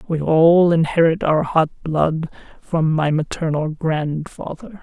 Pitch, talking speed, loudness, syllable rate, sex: 160 Hz, 125 wpm, -18 LUFS, 3.8 syllables/s, female